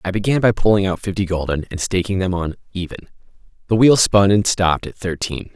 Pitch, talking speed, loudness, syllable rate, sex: 95 Hz, 205 wpm, -18 LUFS, 6.0 syllables/s, male